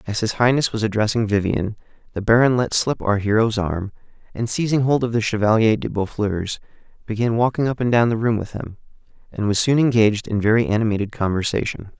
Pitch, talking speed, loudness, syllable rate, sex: 110 Hz, 190 wpm, -20 LUFS, 5.9 syllables/s, male